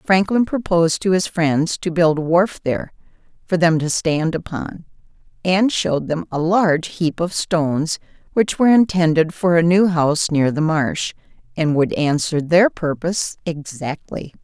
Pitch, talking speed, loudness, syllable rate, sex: 165 Hz, 160 wpm, -18 LUFS, 4.6 syllables/s, female